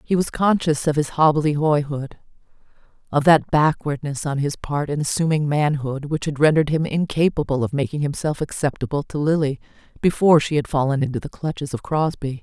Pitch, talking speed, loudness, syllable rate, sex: 145 Hz, 165 wpm, -21 LUFS, 5.7 syllables/s, female